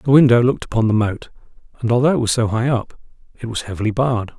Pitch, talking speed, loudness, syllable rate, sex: 120 Hz, 235 wpm, -18 LUFS, 6.9 syllables/s, male